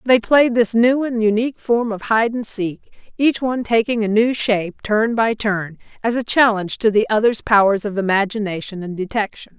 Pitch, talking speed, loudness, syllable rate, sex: 220 Hz, 195 wpm, -18 LUFS, 5.2 syllables/s, female